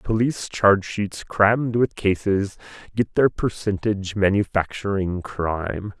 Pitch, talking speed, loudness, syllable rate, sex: 100 Hz, 100 wpm, -22 LUFS, 4.4 syllables/s, male